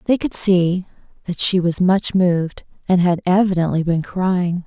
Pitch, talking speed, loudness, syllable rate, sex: 180 Hz, 165 wpm, -18 LUFS, 4.4 syllables/s, female